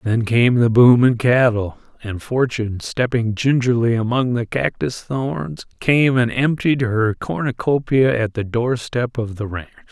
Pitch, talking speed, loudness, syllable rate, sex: 120 Hz, 150 wpm, -18 LUFS, 4.1 syllables/s, male